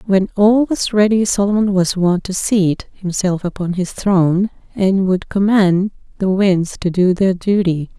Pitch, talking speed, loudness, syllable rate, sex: 190 Hz, 165 wpm, -16 LUFS, 4.2 syllables/s, female